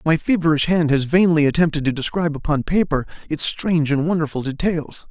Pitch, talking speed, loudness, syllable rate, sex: 160 Hz, 175 wpm, -19 LUFS, 5.9 syllables/s, male